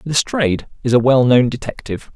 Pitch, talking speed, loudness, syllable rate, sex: 130 Hz, 140 wpm, -16 LUFS, 5.9 syllables/s, male